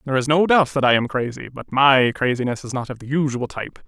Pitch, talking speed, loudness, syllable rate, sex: 135 Hz, 265 wpm, -19 LUFS, 6.3 syllables/s, male